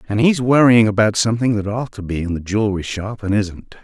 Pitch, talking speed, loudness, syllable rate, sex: 105 Hz, 235 wpm, -17 LUFS, 5.8 syllables/s, male